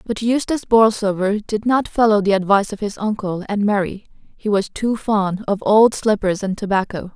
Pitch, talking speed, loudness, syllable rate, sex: 210 Hz, 185 wpm, -18 LUFS, 5.1 syllables/s, female